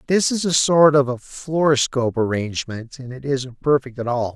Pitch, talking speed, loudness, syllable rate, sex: 135 Hz, 195 wpm, -19 LUFS, 5.0 syllables/s, male